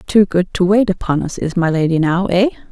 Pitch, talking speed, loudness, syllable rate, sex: 185 Hz, 245 wpm, -16 LUFS, 5.5 syllables/s, female